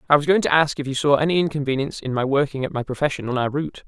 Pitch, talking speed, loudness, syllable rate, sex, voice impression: 140 Hz, 295 wpm, -21 LUFS, 7.7 syllables/s, male, masculine, adult-like, slightly soft, fluent, refreshing, sincere